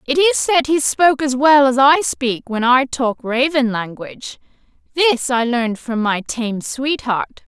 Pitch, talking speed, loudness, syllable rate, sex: 260 Hz, 175 wpm, -16 LUFS, 4.2 syllables/s, female